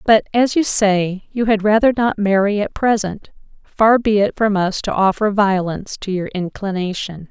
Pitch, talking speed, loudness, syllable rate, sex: 205 Hz, 180 wpm, -17 LUFS, 4.6 syllables/s, female